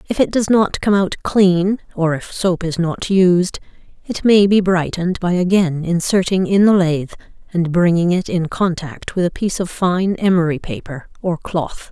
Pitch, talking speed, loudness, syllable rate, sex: 180 Hz, 185 wpm, -17 LUFS, 4.5 syllables/s, female